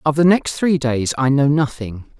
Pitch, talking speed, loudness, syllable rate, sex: 140 Hz, 220 wpm, -17 LUFS, 4.5 syllables/s, male